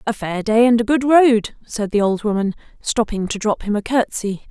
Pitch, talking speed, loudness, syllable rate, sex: 220 Hz, 225 wpm, -18 LUFS, 5.2 syllables/s, female